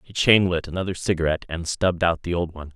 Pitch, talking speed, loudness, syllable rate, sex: 85 Hz, 240 wpm, -22 LUFS, 6.9 syllables/s, male